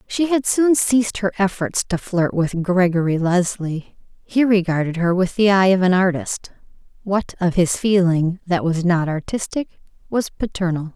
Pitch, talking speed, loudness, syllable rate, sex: 190 Hz, 160 wpm, -19 LUFS, 4.5 syllables/s, female